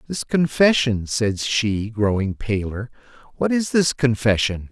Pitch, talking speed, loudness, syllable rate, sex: 120 Hz, 125 wpm, -20 LUFS, 3.9 syllables/s, male